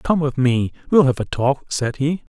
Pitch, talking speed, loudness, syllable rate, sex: 140 Hz, 230 wpm, -19 LUFS, 4.5 syllables/s, male